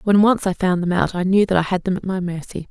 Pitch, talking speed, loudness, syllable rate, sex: 185 Hz, 335 wpm, -19 LUFS, 6.1 syllables/s, female